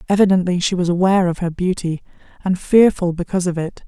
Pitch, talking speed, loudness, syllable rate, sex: 180 Hz, 185 wpm, -17 LUFS, 6.4 syllables/s, female